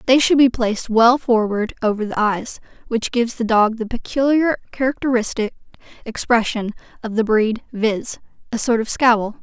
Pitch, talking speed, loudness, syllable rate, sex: 230 Hz, 155 wpm, -18 LUFS, 4.9 syllables/s, female